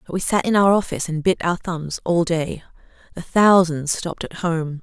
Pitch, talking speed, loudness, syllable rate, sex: 170 Hz, 210 wpm, -20 LUFS, 5.1 syllables/s, female